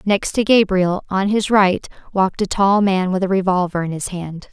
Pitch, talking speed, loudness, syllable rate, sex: 190 Hz, 210 wpm, -18 LUFS, 4.9 syllables/s, female